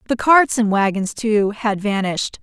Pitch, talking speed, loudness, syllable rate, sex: 215 Hz, 175 wpm, -17 LUFS, 4.5 syllables/s, female